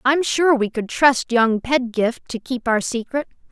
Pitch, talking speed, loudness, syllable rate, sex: 250 Hz, 190 wpm, -19 LUFS, 4.1 syllables/s, female